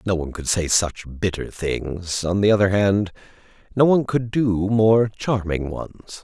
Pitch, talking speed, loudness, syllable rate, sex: 100 Hz, 175 wpm, -21 LUFS, 4.2 syllables/s, male